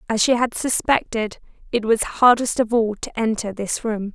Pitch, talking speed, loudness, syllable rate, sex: 225 Hz, 190 wpm, -20 LUFS, 4.7 syllables/s, female